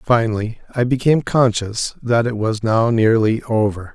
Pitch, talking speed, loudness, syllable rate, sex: 115 Hz, 150 wpm, -18 LUFS, 4.6 syllables/s, male